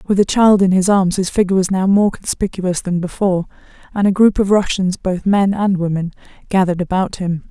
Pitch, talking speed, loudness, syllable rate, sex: 190 Hz, 210 wpm, -16 LUFS, 5.7 syllables/s, female